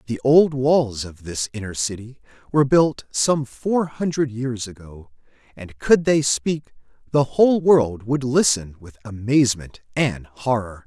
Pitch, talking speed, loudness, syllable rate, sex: 125 Hz, 150 wpm, -20 LUFS, 4.1 syllables/s, male